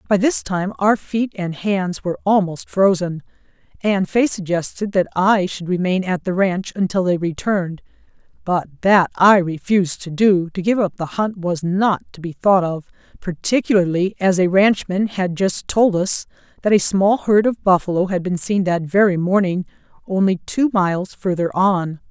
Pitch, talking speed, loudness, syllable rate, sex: 185 Hz, 175 wpm, -18 LUFS, 4.6 syllables/s, female